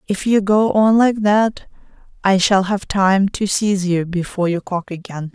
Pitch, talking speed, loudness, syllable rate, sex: 195 Hz, 190 wpm, -17 LUFS, 4.5 syllables/s, female